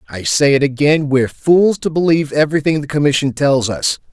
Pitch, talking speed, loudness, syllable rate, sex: 145 Hz, 190 wpm, -15 LUFS, 5.8 syllables/s, male